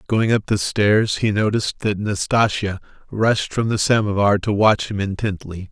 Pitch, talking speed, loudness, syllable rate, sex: 105 Hz, 170 wpm, -19 LUFS, 4.6 syllables/s, male